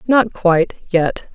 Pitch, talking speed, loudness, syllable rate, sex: 190 Hz, 135 wpm, -16 LUFS, 3.9 syllables/s, female